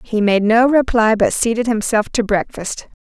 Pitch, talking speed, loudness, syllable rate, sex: 225 Hz, 180 wpm, -16 LUFS, 4.6 syllables/s, female